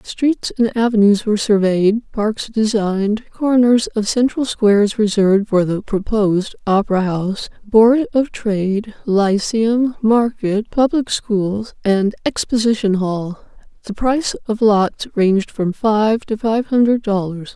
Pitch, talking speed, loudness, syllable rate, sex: 215 Hz, 130 wpm, -17 LUFS, 4.1 syllables/s, female